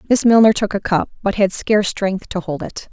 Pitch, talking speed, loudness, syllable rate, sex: 205 Hz, 245 wpm, -17 LUFS, 5.4 syllables/s, female